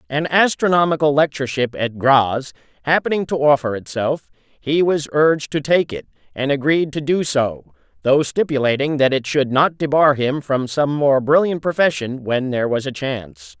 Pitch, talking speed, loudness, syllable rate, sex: 140 Hz, 170 wpm, -18 LUFS, 4.8 syllables/s, male